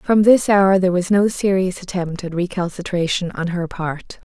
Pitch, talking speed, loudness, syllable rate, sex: 185 Hz, 180 wpm, -18 LUFS, 4.8 syllables/s, female